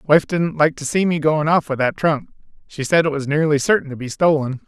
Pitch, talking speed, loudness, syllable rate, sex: 150 Hz, 245 wpm, -18 LUFS, 5.5 syllables/s, male